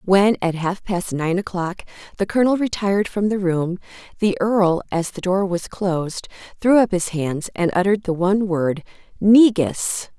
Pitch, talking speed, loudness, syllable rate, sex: 190 Hz, 170 wpm, -20 LUFS, 4.6 syllables/s, female